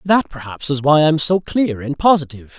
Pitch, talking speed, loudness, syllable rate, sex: 150 Hz, 210 wpm, -16 LUFS, 5.3 syllables/s, male